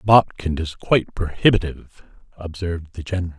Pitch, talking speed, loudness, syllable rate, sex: 90 Hz, 125 wpm, -21 LUFS, 5.8 syllables/s, male